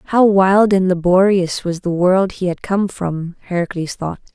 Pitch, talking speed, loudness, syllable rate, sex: 185 Hz, 180 wpm, -16 LUFS, 4.2 syllables/s, female